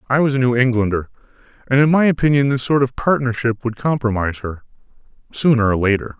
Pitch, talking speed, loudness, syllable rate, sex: 125 Hz, 185 wpm, -17 LUFS, 6.3 syllables/s, male